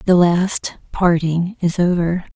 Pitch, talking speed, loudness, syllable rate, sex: 175 Hz, 130 wpm, -17 LUFS, 3.4 syllables/s, female